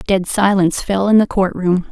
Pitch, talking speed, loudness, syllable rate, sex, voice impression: 190 Hz, 220 wpm, -15 LUFS, 5.2 syllables/s, female, feminine, adult-like, slightly fluent, slightly calm, slightly elegant